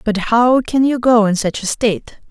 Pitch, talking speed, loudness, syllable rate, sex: 230 Hz, 235 wpm, -15 LUFS, 4.7 syllables/s, female